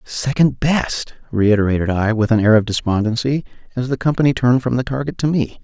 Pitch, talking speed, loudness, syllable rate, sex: 120 Hz, 190 wpm, -17 LUFS, 5.8 syllables/s, male